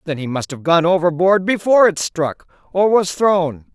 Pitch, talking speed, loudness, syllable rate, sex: 180 Hz, 175 wpm, -16 LUFS, 4.9 syllables/s, female